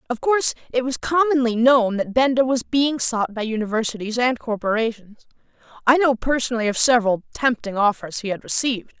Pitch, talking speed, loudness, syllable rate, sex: 240 Hz, 165 wpm, -20 LUFS, 5.7 syllables/s, female